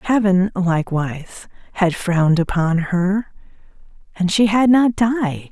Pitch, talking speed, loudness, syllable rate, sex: 190 Hz, 120 wpm, -17 LUFS, 4.3 syllables/s, female